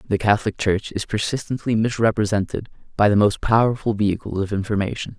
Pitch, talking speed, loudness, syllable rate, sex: 105 Hz, 150 wpm, -21 LUFS, 6.1 syllables/s, male